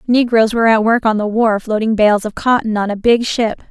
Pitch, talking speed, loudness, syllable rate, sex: 220 Hz, 245 wpm, -14 LUFS, 5.4 syllables/s, female